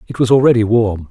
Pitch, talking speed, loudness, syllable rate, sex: 110 Hz, 220 wpm, -13 LUFS, 6.3 syllables/s, male